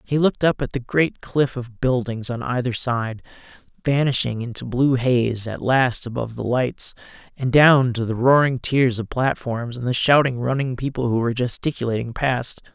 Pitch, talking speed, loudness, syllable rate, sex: 125 Hz, 180 wpm, -21 LUFS, 4.9 syllables/s, male